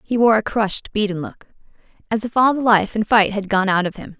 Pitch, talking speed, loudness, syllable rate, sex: 210 Hz, 255 wpm, -18 LUFS, 5.8 syllables/s, female